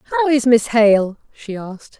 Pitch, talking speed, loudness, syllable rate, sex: 225 Hz, 180 wpm, -15 LUFS, 4.9 syllables/s, female